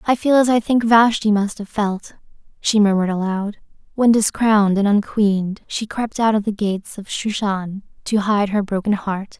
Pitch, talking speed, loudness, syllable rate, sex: 210 Hz, 185 wpm, -18 LUFS, 4.9 syllables/s, female